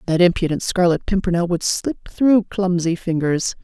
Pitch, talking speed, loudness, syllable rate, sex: 180 Hz, 150 wpm, -19 LUFS, 4.7 syllables/s, female